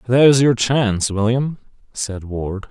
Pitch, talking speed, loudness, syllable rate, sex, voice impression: 115 Hz, 135 wpm, -18 LUFS, 4.1 syllables/s, male, masculine, adult-like, tensed, powerful, slightly bright, clear, slightly raspy, intellectual, calm, friendly, reassuring, wild, lively, kind, slightly intense